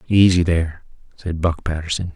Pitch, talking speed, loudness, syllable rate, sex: 85 Hz, 140 wpm, -19 LUFS, 5.4 syllables/s, male